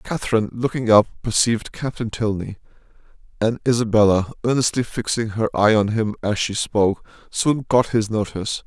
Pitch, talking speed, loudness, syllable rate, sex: 110 Hz, 145 wpm, -20 LUFS, 5.4 syllables/s, male